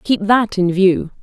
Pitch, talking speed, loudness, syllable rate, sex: 195 Hz, 195 wpm, -15 LUFS, 3.9 syllables/s, female